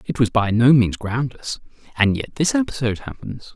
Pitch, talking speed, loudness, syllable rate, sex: 120 Hz, 170 wpm, -20 LUFS, 5.2 syllables/s, male